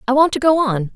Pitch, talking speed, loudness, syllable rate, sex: 265 Hz, 315 wpm, -16 LUFS, 6.2 syllables/s, female